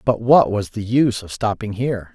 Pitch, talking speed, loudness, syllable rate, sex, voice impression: 110 Hz, 225 wpm, -19 LUFS, 5.4 syllables/s, male, masculine, old, powerful, slightly hard, raspy, sincere, calm, mature, wild, slightly strict